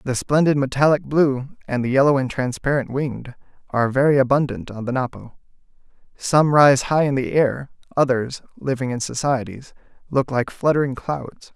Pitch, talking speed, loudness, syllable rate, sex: 135 Hz, 155 wpm, -20 LUFS, 5.1 syllables/s, male